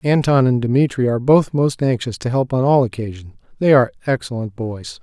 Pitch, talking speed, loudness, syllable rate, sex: 125 Hz, 190 wpm, -17 LUFS, 5.8 syllables/s, male